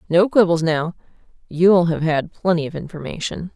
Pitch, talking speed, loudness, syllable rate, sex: 170 Hz, 135 wpm, -19 LUFS, 5.0 syllables/s, female